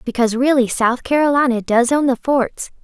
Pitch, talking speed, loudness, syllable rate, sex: 255 Hz, 170 wpm, -16 LUFS, 5.3 syllables/s, female